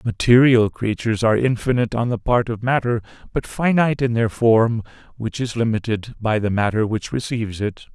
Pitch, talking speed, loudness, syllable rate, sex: 115 Hz, 175 wpm, -20 LUFS, 5.5 syllables/s, male